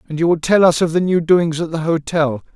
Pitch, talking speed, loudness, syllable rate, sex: 165 Hz, 280 wpm, -16 LUFS, 5.7 syllables/s, male